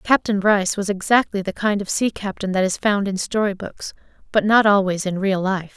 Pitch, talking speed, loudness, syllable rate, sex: 200 Hz, 220 wpm, -20 LUFS, 5.3 syllables/s, female